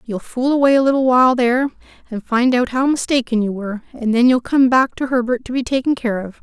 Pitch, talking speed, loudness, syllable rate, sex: 250 Hz, 245 wpm, -17 LUFS, 6.0 syllables/s, female